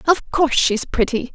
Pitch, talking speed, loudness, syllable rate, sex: 275 Hz, 180 wpm, -18 LUFS, 5.0 syllables/s, female